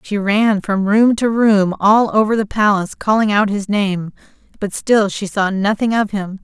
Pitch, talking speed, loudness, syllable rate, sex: 205 Hz, 195 wpm, -15 LUFS, 4.4 syllables/s, female